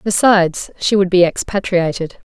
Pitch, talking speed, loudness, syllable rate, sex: 185 Hz, 130 wpm, -15 LUFS, 4.9 syllables/s, female